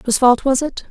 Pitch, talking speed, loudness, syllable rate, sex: 255 Hz, 265 wpm, -16 LUFS, 6.7 syllables/s, female